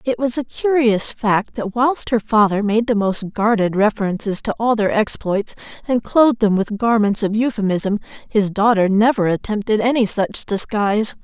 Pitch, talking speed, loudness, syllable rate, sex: 215 Hz, 170 wpm, -18 LUFS, 4.8 syllables/s, female